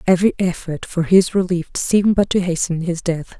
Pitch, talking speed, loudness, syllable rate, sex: 180 Hz, 195 wpm, -18 LUFS, 5.4 syllables/s, female